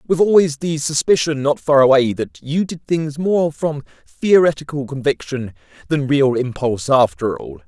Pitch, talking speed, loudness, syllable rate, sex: 140 Hz, 155 wpm, -17 LUFS, 4.6 syllables/s, male